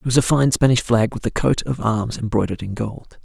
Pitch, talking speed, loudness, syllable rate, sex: 115 Hz, 260 wpm, -20 LUFS, 5.6 syllables/s, male